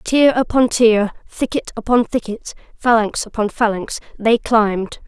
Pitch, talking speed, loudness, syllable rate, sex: 225 Hz, 130 wpm, -17 LUFS, 4.4 syllables/s, female